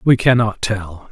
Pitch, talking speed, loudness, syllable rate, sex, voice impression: 110 Hz, 160 wpm, -17 LUFS, 4.0 syllables/s, male, very masculine, very middle-aged, thick, tensed, slightly powerful, slightly bright, slightly soft, clear, fluent, slightly raspy, slightly cool, slightly intellectual, refreshing, slightly sincere, calm, mature, slightly friendly, slightly reassuring, very unique, wild, very lively, intense, sharp